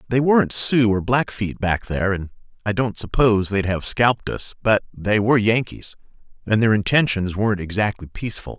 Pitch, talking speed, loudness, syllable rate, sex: 105 Hz, 175 wpm, -20 LUFS, 5.4 syllables/s, male